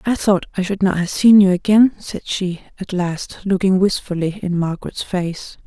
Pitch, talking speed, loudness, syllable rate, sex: 190 Hz, 190 wpm, -17 LUFS, 4.8 syllables/s, female